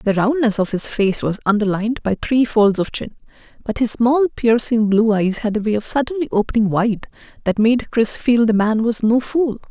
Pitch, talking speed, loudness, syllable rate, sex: 225 Hz, 210 wpm, -18 LUFS, 5.1 syllables/s, female